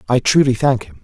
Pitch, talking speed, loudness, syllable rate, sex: 120 Hz, 235 wpm, -15 LUFS, 5.9 syllables/s, male